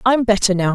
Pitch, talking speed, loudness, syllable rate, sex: 210 Hz, 320 wpm, -16 LUFS, 7.1 syllables/s, female